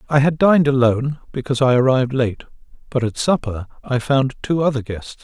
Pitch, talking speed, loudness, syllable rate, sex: 130 Hz, 185 wpm, -18 LUFS, 6.0 syllables/s, male